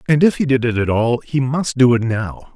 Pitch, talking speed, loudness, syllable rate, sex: 125 Hz, 280 wpm, -17 LUFS, 5.1 syllables/s, male